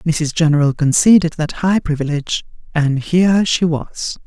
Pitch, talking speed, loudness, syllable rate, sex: 160 Hz, 140 wpm, -16 LUFS, 4.7 syllables/s, female